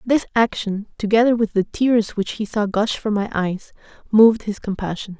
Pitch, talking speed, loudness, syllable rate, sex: 210 Hz, 185 wpm, -19 LUFS, 4.9 syllables/s, female